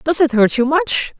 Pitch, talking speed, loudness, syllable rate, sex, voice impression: 290 Hz, 250 wpm, -15 LUFS, 4.4 syllables/s, female, very feminine, slightly young, thin, tensed, slightly powerful, bright, slightly hard, very clear, fluent, slightly raspy, cute, intellectual, very refreshing, sincere, calm, very friendly, reassuring, unique, slightly elegant, slightly wild, sweet, very lively, strict, intense, slightly sharp